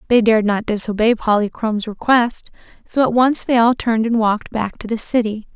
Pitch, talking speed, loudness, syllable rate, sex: 225 Hz, 195 wpm, -17 LUFS, 5.6 syllables/s, female